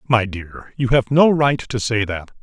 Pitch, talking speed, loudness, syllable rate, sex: 120 Hz, 225 wpm, -18 LUFS, 4.1 syllables/s, male